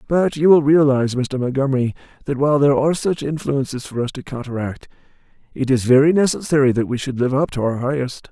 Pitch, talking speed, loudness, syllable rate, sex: 135 Hz, 200 wpm, -18 LUFS, 6.3 syllables/s, male